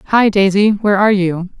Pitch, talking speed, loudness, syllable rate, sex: 200 Hz, 190 wpm, -13 LUFS, 5.4 syllables/s, female